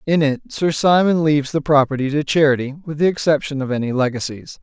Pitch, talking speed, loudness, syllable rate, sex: 145 Hz, 195 wpm, -18 LUFS, 6.1 syllables/s, male